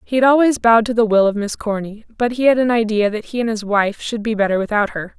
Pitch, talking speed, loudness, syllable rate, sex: 220 Hz, 290 wpm, -17 LUFS, 6.3 syllables/s, female